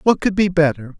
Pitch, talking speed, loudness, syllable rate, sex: 170 Hz, 240 wpm, -17 LUFS, 5.6 syllables/s, male